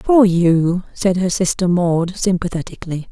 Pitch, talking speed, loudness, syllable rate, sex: 180 Hz, 135 wpm, -17 LUFS, 4.8 syllables/s, female